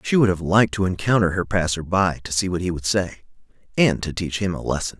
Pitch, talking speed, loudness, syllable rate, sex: 95 Hz, 250 wpm, -21 LUFS, 6.0 syllables/s, male